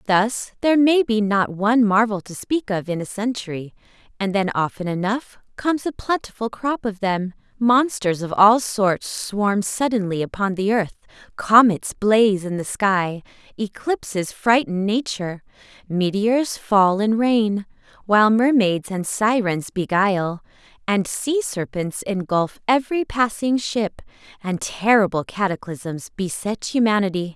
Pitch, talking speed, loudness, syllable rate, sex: 210 Hz, 135 wpm, -20 LUFS, 4.3 syllables/s, female